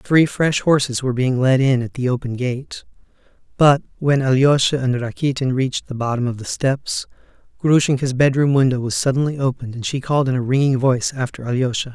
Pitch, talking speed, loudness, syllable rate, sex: 130 Hz, 185 wpm, -19 LUFS, 5.7 syllables/s, male